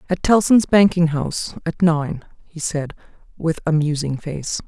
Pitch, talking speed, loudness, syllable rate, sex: 160 Hz, 155 wpm, -19 LUFS, 4.3 syllables/s, female